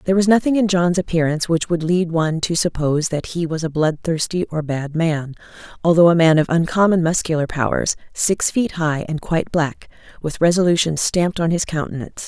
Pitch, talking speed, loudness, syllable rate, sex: 165 Hz, 195 wpm, -18 LUFS, 5.7 syllables/s, female